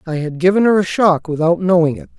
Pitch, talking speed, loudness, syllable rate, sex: 170 Hz, 245 wpm, -15 LUFS, 6.1 syllables/s, male